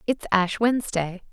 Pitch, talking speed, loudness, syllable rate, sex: 205 Hz, 135 wpm, -23 LUFS, 4.7 syllables/s, female